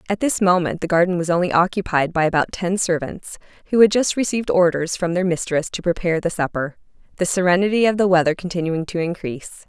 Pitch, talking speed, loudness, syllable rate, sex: 180 Hz, 200 wpm, -19 LUFS, 6.3 syllables/s, female